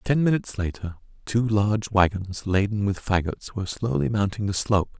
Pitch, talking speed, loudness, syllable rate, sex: 100 Hz, 170 wpm, -24 LUFS, 5.4 syllables/s, male